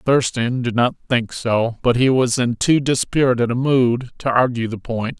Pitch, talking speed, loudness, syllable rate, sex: 125 Hz, 195 wpm, -18 LUFS, 4.6 syllables/s, male